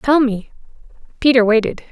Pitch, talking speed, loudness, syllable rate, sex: 245 Hz, 125 wpm, -15 LUFS, 5.2 syllables/s, female